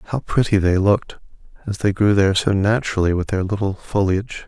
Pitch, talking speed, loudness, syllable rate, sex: 100 Hz, 190 wpm, -19 LUFS, 5.9 syllables/s, male